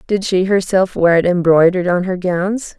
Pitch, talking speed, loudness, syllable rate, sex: 185 Hz, 195 wpm, -15 LUFS, 4.9 syllables/s, female